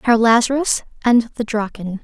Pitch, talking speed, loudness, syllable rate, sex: 230 Hz, 150 wpm, -17 LUFS, 4.7 syllables/s, female